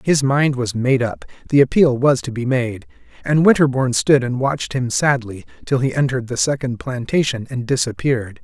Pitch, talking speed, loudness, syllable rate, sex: 130 Hz, 185 wpm, -18 LUFS, 5.4 syllables/s, male